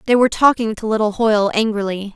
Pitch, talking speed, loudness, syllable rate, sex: 215 Hz, 195 wpm, -17 LUFS, 6.5 syllables/s, female